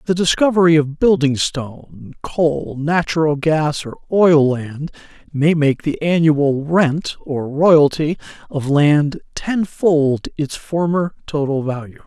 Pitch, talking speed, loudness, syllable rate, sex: 155 Hz, 125 wpm, -17 LUFS, 3.6 syllables/s, male